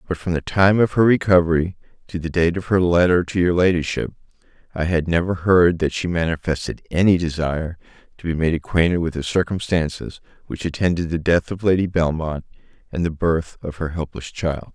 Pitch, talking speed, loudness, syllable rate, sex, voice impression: 85 Hz, 185 wpm, -20 LUFS, 5.6 syllables/s, male, very masculine, adult-like, slightly thick, cool, slightly sincere, slightly calm, slightly kind